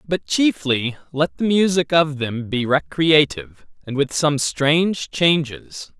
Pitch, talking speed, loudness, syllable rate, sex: 145 Hz, 140 wpm, -19 LUFS, 3.8 syllables/s, male